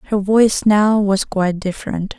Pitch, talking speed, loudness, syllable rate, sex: 200 Hz, 165 wpm, -16 LUFS, 5.1 syllables/s, female